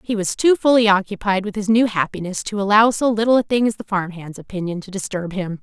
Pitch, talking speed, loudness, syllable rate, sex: 205 Hz, 245 wpm, -19 LUFS, 6.0 syllables/s, female